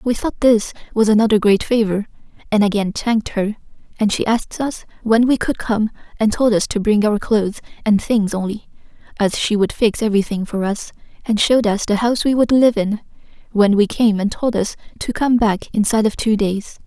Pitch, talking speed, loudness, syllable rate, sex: 215 Hz, 205 wpm, -17 LUFS, 5.4 syllables/s, female